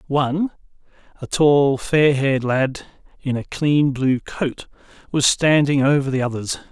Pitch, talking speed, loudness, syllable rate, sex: 140 Hz, 145 wpm, -19 LUFS, 4.2 syllables/s, male